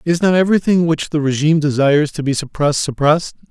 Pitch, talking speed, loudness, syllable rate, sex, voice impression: 155 Hz, 190 wpm, -15 LUFS, 6.7 syllables/s, male, very masculine, very adult-like, slightly old, thick, slightly tensed, slightly weak, slightly bright, hard, clear, fluent, slightly raspy, slightly cool, very intellectual, slightly refreshing, sincere, calm, mature, friendly, reassuring, unique, elegant, slightly wild, sweet, slightly lively, kind, slightly modest